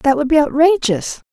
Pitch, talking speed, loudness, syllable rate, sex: 285 Hz, 180 wpm, -15 LUFS, 5.0 syllables/s, female